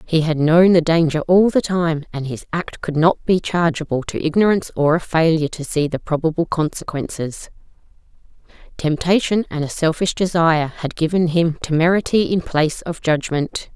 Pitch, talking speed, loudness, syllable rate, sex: 165 Hz, 160 wpm, -18 LUFS, 5.1 syllables/s, female